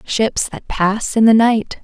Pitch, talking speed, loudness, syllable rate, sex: 220 Hz, 195 wpm, -15 LUFS, 3.6 syllables/s, female